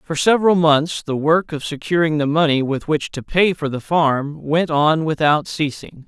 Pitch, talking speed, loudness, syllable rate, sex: 155 Hz, 200 wpm, -18 LUFS, 4.6 syllables/s, male